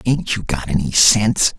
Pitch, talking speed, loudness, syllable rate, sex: 110 Hz, 190 wpm, -16 LUFS, 4.8 syllables/s, male